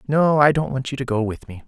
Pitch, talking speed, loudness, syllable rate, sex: 130 Hz, 320 wpm, -20 LUFS, 6.0 syllables/s, male